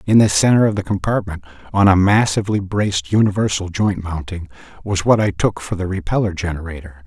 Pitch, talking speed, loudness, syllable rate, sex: 95 Hz, 180 wpm, -17 LUFS, 5.9 syllables/s, male